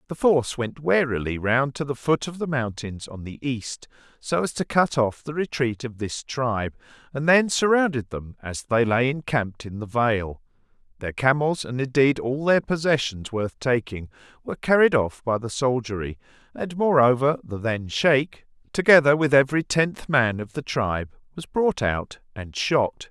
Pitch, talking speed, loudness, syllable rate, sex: 130 Hz, 175 wpm, -23 LUFS, 4.7 syllables/s, male